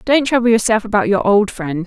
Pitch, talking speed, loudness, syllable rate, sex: 215 Hz, 225 wpm, -15 LUFS, 5.5 syllables/s, female